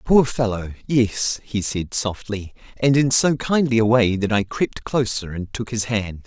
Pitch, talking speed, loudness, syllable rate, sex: 115 Hz, 190 wpm, -21 LUFS, 4.2 syllables/s, male